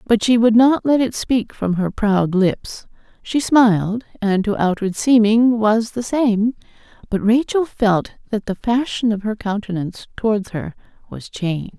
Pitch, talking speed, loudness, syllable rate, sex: 220 Hz, 170 wpm, -18 LUFS, 4.4 syllables/s, female